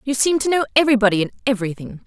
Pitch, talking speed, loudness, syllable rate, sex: 240 Hz, 205 wpm, -18 LUFS, 8.1 syllables/s, female